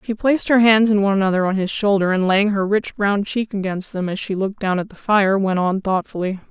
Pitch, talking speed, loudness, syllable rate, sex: 200 Hz, 260 wpm, -18 LUFS, 5.9 syllables/s, female